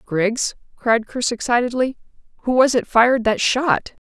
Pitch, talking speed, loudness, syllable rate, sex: 240 Hz, 145 wpm, -19 LUFS, 4.4 syllables/s, female